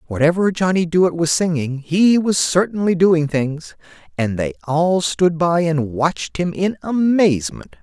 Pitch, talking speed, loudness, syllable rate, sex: 165 Hz, 155 wpm, -18 LUFS, 4.3 syllables/s, male